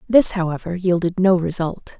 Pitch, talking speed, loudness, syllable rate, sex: 180 Hz, 150 wpm, -19 LUFS, 5.0 syllables/s, female